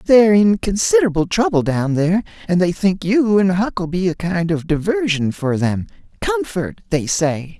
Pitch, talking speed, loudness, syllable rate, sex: 180 Hz, 165 wpm, -17 LUFS, 4.7 syllables/s, male